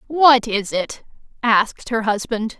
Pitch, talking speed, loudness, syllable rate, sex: 230 Hz, 140 wpm, -18 LUFS, 3.9 syllables/s, female